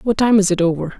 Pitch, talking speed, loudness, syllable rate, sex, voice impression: 195 Hz, 300 wpm, -16 LUFS, 6.3 syllables/s, female, feminine, adult-like, slightly powerful, slightly dark, clear, fluent, slightly raspy, intellectual, calm, elegant, slightly strict, slightly sharp